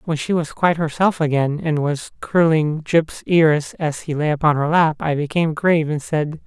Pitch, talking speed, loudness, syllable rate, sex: 155 Hz, 205 wpm, -19 LUFS, 4.9 syllables/s, male